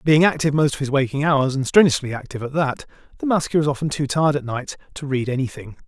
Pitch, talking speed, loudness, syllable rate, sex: 140 Hz, 235 wpm, -20 LUFS, 7.0 syllables/s, male